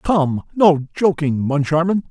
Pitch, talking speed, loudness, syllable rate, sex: 160 Hz, 115 wpm, -17 LUFS, 3.9 syllables/s, male